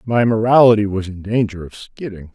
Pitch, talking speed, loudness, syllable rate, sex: 105 Hz, 180 wpm, -15 LUFS, 5.3 syllables/s, male